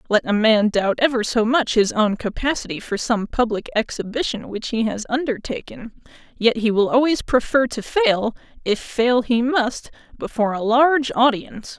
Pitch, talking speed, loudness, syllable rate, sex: 235 Hz, 160 wpm, -20 LUFS, 4.9 syllables/s, female